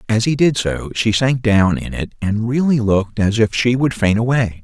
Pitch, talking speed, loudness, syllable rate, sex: 115 Hz, 235 wpm, -17 LUFS, 4.8 syllables/s, male